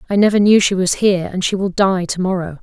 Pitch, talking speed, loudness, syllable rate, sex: 190 Hz, 275 wpm, -15 LUFS, 6.2 syllables/s, female